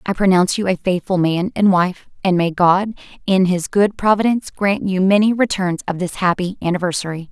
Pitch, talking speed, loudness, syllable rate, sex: 185 Hz, 190 wpm, -17 LUFS, 5.5 syllables/s, female